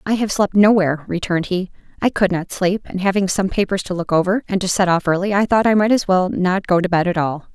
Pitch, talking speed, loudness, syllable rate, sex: 190 Hz, 270 wpm, -18 LUFS, 6.0 syllables/s, female